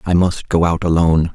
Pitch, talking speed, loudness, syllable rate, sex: 85 Hz, 220 wpm, -16 LUFS, 5.7 syllables/s, male